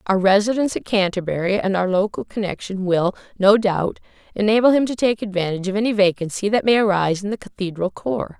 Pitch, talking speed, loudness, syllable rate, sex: 200 Hz, 185 wpm, -20 LUFS, 6.1 syllables/s, female